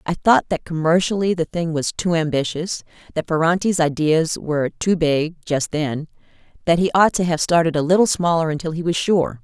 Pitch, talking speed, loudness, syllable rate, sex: 165 Hz, 190 wpm, -19 LUFS, 5.3 syllables/s, female